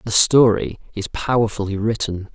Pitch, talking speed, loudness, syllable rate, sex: 105 Hz, 130 wpm, -19 LUFS, 4.9 syllables/s, male